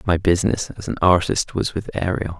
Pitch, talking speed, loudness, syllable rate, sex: 90 Hz, 200 wpm, -20 LUFS, 5.5 syllables/s, male